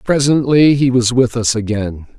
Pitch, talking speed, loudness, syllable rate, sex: 125 Hz, 165 wpm, -14 LUFS, 4.5 syllables/s, male